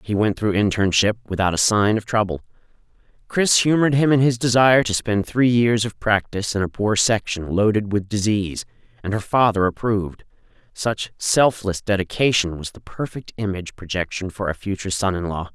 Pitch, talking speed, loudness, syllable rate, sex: 105 Hz, 180 wpm, -20 LUFS, 5.5 syllables/s, male